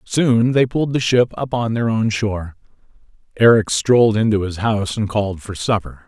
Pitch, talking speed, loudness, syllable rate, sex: 110 Hz, 190 wpm, -17 LUFS, 5.3 syllables/s, male